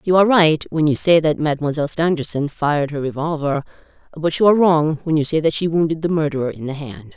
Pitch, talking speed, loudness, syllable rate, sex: 155 Hz, 225 wpm, -18 LUFS, 6.3 syllables/s, female